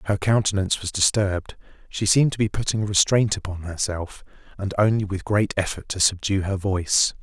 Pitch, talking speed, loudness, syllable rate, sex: 100 Hz, 185 wpm, -22 LUFS, 5.7 syllables/s, male